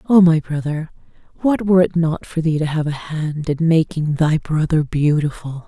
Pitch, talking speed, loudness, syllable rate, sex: 160 Hz, 190 wpm, -18 LUFS, 4.9 syllables/s, female